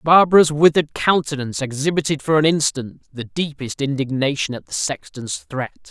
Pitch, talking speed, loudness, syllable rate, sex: 145 Hz, 140 wpm, -19 LUFS, 5.2 syllables/s, male